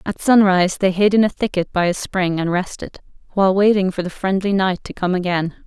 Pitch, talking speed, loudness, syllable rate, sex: 190 Hz, 225 wpm, -18 LUFS, 5.6 syllables/s, female